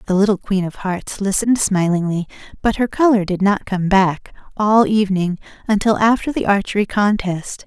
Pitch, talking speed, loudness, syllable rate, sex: 200 Hz, 165 wpm, -17 LUFS, 5.1 syllables/s, female